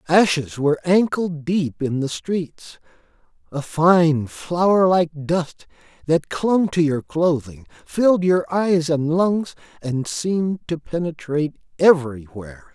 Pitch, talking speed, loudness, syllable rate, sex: 160 Hz, 120 wpm, -20 LUFS, 3.7 syllables/s, male